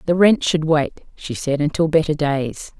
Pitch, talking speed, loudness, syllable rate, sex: 155 Hz, 195 wpm, -19 LUFS, 4.4 syllables/s, female